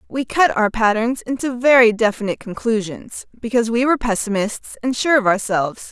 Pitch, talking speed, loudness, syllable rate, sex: 230 Hz, 160 wpm, -18 LUFS, 5.6 syllables/s, female